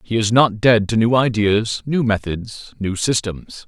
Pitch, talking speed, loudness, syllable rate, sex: 110 Hz, 180 wpm, -18 LUFS, 4.0 syllables/s, male